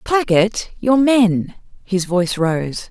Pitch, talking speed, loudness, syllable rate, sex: 205 Hz, 105 wpm, -17 LUFS, 3.3 syllables/s, female